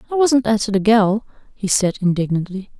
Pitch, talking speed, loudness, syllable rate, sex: 210 Hz, 170 wpm, -18 LUFS, 5.5 syllables/s, female